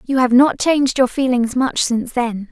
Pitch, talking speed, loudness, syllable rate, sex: 250 Hz, 215 wpm, -16 LUFS, 5.0 syllables/s, female